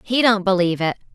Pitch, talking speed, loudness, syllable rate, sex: 200 Hz, 210 wpm, -19 LUFS, 6.7 syllables/s, female